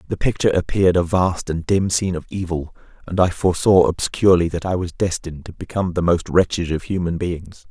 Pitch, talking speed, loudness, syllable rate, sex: 90 Hz, 200 wpm, -19 LUFS, 6.1 syllables/s, male